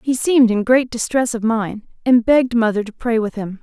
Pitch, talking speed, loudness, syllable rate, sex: 235 Hz, 230 wpm, -17 LUFS, 5.4 syllables/s, female